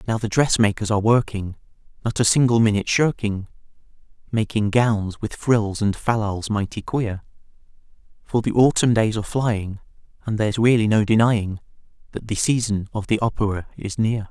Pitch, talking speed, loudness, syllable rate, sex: 110 Hz, 160 wpm, -21 LUFS, 5.2 syllables/s, male